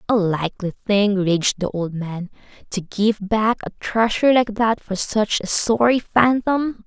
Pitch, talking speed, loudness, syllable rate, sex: 210 Hz, 165 wpm, -19 LUFS, 4.2 syllables/s, female